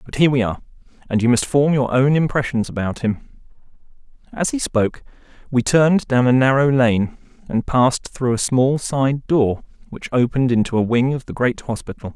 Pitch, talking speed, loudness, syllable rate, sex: 125 Hz, 190 wpm, -18 LUFS, 5.6 syllables/s, male